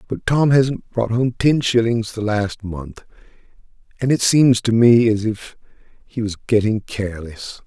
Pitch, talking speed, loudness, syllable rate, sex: 115 Hz, 165 wpm, -18 LUFS, 4.2 syllables/s, male